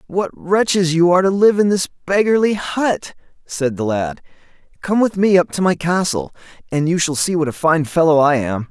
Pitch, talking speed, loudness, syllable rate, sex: 170 Hz, 205 wpm, -17 LUFS, 5.0 syllables/s, male